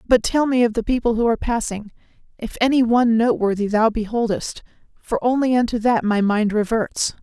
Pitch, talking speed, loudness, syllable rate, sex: 230 Hz, 190 wpm, -19 LUFS, 5.4 syllables/s, female